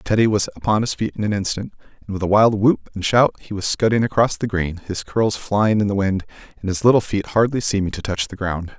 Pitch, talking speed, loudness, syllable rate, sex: 100 Hz, 255 wpm, -19 LUFS, 5.8 syllables/s, male